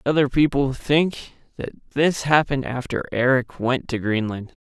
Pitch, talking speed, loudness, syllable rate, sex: 135 Hz, 140 wpm, -21 LUFS, 4.4 syllables/s, male